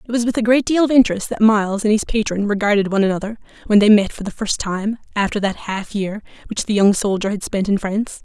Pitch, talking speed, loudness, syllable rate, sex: 210 Hz, 255 wpm, -18 LUFS, 6.3 syllables/s, female